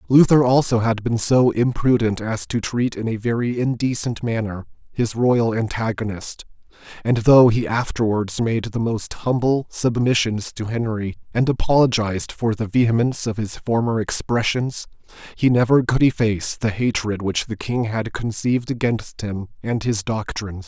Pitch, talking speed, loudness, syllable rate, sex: 115 Hz, 155 wpm, -20 LUFS, 4.7 syllables/s, male